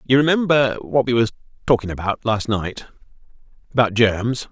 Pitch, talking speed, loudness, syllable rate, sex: 120 Hz, 145 wpm, -19 LUFS, 5.2 syllables/s, male